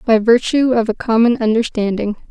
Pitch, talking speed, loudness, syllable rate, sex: 230 Hz, 155 wpm, -15 LUFS, 5.3 syllables/s, female